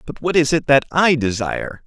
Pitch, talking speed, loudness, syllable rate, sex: 145 Hz, 225 wpm, -17 LUFS, 5.4 syllables/s, male